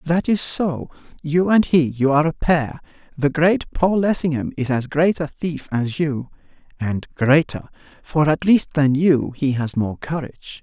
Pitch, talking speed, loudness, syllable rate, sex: 150 Hz, 160 wpm, -19 LUFS, 4.5 syllables/s, male